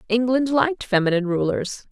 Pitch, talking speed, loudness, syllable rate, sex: 220 Hz, 125 wpm, -21 LUFS, 6.0 syllables/s, female